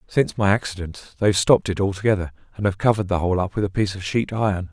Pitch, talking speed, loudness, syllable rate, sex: 95 Hz, 255 wpm, -21 LUFS, 7.2 syllables/s, male